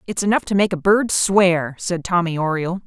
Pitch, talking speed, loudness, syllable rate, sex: 180 Hz, 210 wpm, -18 LUFS, 5.3 syllables/s, female